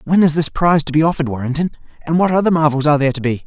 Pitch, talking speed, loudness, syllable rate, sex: 155 Hz, 275 wpm, -16 LUFS, 8.2 syllables/s, male